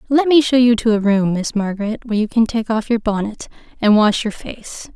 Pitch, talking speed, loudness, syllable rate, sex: 225 Hz, 240 wpm, -17 LUFS, 5.4 syllables/s, female